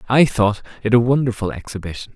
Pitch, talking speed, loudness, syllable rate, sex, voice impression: 115 Hz, 165 wpm, -19 LUFS, 6.2 syllables/s, male, masculine, adult-like, slightly powerful, slightly halting, slightly refreshing, slightly sincere